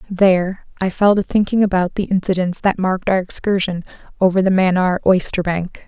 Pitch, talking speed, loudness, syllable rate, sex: 190 Hz, 165 wpm, -17 LUFS, 5.4 syllables/s, female